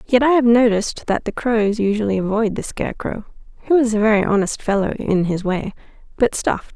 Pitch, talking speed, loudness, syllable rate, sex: 215 Hz, 195 wpm, -18 LUFS, 5.7 syllables/s, female